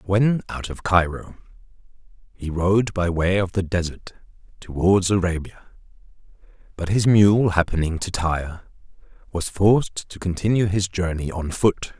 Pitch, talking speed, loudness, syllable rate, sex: 95 Hz, 135 wpm, -21 LUFS, 4.4 syllables/s, male